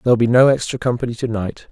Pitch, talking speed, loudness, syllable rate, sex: 120 Hz, 245 wpm, -17 LUFS, 6.9 syllables/s, male